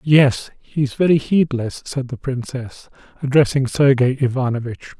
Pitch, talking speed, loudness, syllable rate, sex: 135 Hz, 120 wpm, -18 LUFS, 4.5 syllables/s, male